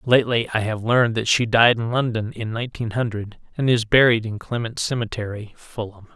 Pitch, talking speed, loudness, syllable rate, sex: 115 Hz, 185 wpm, -21 LUFS, 5.6 syllables/s, male